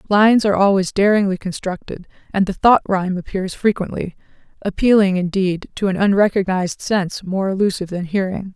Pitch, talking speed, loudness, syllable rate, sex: 190 Hz, 140 wpm, -18 LUFS, 5.9 syllables/s, female